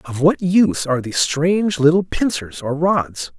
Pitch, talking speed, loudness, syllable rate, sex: 160 Hz, 175 wpm, -18 LUFS, 4.9 syllables/s, male